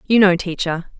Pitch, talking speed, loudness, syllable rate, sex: 185 Hz, 180 wpm, -17 LUFS, 4.8 syllables/s, female